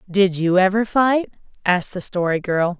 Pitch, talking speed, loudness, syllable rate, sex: 190 Hz, 170 wpm, -19 LUFS, 4.9 syllables/s, female